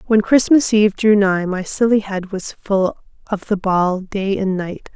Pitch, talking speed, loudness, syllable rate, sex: 200 Hz, 195 wpm, -17 LUFS, 4.3 syllables/s, female